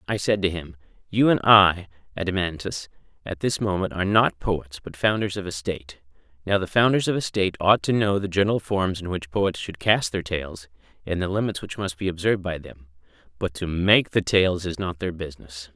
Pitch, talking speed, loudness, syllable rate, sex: 95 Hz, 215 wpm, -23 LUFS, 5.5 syllables/s, male